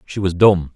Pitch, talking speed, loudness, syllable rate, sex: 90 Hz, 235 wpm, -15 LUFS, 4.6 syllables/s, male